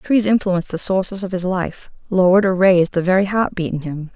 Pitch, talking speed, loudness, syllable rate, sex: 185 Hz, 230 wpm, -18 LUFS, 5.9 syllables/s, female